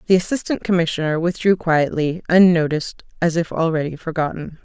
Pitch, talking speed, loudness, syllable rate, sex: 165 Hz, 130 wpm, -19 LUFS, 5.7 syllables/s, female